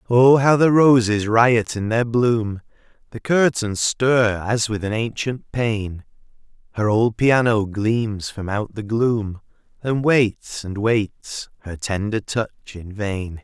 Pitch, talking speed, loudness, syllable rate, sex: 110 Hz, 145 wpm, -19 LUFS, 3.4 syllables/s, male